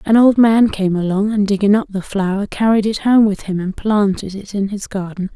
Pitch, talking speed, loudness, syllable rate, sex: 205 Hz, 235 wpm, -16 LUFS, 5.2 syllables/s, female